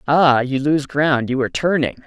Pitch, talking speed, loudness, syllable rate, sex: 140 Hz, 205 wpm, -18 LUFS, 4.7 syllables/s, male